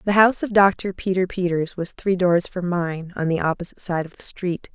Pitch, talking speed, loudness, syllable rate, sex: 180 Hz, 230 wpm, -22 LUFS, 5.2 syllables/s, female